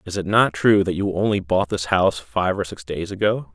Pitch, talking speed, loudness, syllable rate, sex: 95 Hz, 255 wpm, -20 LUFS, 5.3 syllables/s, male